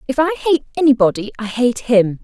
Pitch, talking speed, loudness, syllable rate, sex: 250 Hz, 190 wpm, -16 LUFS, 5.7 syllables/s, female